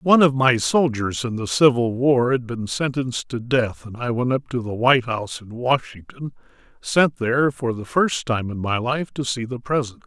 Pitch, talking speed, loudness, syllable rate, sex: 125 Hz, 210 wpm, -21 LUFS, 5.0 syllables/s, male